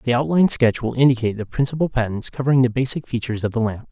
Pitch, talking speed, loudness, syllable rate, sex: 120 Hz, 230 wpm, -20 LUFS, 7.2 syllables/s, male